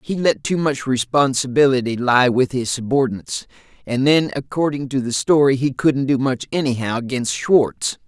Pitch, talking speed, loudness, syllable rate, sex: 130 Hz, 155 wpm, -18 LUFS, 5.0 syllables/s, male